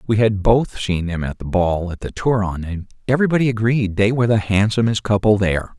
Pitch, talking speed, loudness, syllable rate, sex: 105 Hz, 205 wpm, -18 LUFS, 5.8 syllables/s, male